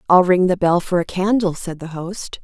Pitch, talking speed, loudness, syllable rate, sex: 180 Hz, 245 wpm, -18 LUFS, 4.9 syllables/s, female